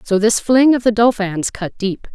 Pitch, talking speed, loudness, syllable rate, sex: 215 Hz, 225 wpm, -16 LUFS, 4.5 syllables/s, female